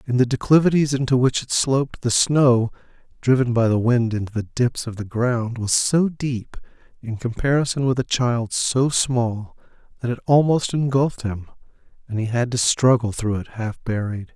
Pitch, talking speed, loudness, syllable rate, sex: 120 Hz, 180 wpm, -20 LUFS, 4.8 syllables/s, male